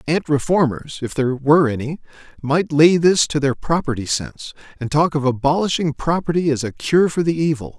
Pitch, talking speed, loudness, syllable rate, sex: 150 Hz, 185 wpm, -18 LUFS, 5.5 syllables/s, male